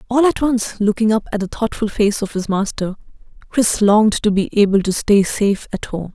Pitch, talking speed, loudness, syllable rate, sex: 210 Hz, 215 wpm, -17 LUFS, 5.3 syllables/s, female